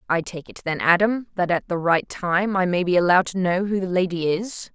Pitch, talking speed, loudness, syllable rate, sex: 180 Hz, 255 wpm, -21 LUFS, 5.3 syllables/s, female